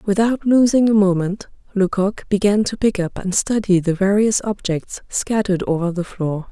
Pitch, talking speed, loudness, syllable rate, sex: 200 Hz, 165 wpm, -18 LUFS, 4.9 syllables/s, female